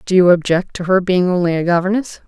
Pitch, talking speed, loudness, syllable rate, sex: 180 Hz, 235 wpm, -15 LUFS, 6.1 syllables/s, female